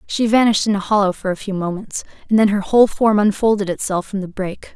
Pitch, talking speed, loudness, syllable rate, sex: 205 Hz, 240 wpm, -17 LUFS, 6.5 syllables/s, female